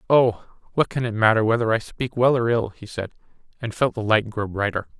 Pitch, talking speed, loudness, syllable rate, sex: 115 Hz, 230 wpm, -22 LUFS, 5.5 syllables/s, male